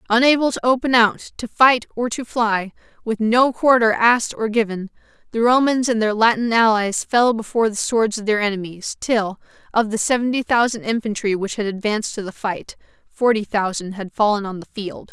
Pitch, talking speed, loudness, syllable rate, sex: 225 Hz, 185 wpm, -19 LUFS, 5.3 syllables/s, female